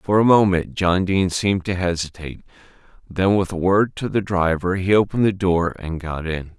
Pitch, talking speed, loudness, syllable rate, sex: 90 Hz, 200 wpm, -20 LUFS, 5.3 syllables/s, male